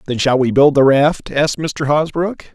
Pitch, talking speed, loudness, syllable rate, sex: 145 Hz, 215 wpm, -15 LUFS, 4.6 syllables/s, male